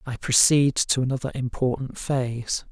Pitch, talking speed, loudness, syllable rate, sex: 130 Hz, 135 wpm, -23 LUFS, 4.7 syllables/s, male